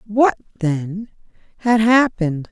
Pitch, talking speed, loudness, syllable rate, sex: 205 Hz, 95 wpm, -18 LUFS, 3.7 syllables/s, female